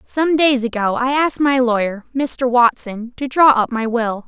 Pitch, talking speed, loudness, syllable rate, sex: 250 Hz, 195 wpm, -16 LUFS, 4.4 syllables/s, female